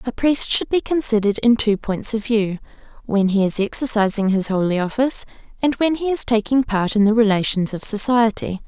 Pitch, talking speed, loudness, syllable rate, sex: 220 Hz, 195 wpm, -18 LUFS, 5.5 syllables/s, female